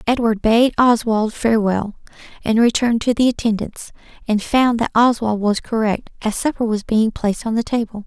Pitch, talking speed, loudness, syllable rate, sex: 225 Hz, 170 wpm, -18 LUFS, 5.2 syllables/s, female